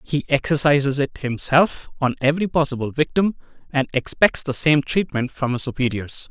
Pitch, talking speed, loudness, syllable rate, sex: 140 Hz, 150 wpm, -20 LUFS, 5.2 syllables/s, male